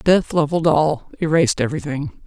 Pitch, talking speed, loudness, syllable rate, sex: 155 Hz, 135 wpm, -19 LUFS, 5.7 syllables/s, female